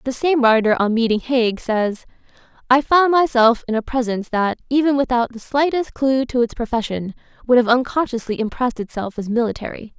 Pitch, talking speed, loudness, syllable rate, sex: 245 Hz, 175 wpm, -18 LUFS, 5.6 syllables/s, female